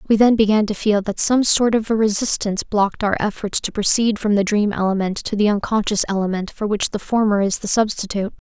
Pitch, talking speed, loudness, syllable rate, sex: 210 Hz, 220 wpm, -18 LUFS, 5.9 syllables/s, female